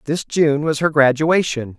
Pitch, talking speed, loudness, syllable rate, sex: 150 Hz, 170 wpm, -17 LUFS, 4.3 syllables/s, male